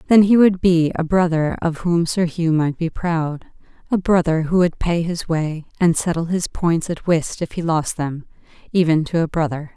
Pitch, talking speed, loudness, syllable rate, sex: 165 Hz, 205 wpm, -19 LUFS, 4.6 syllables/s, female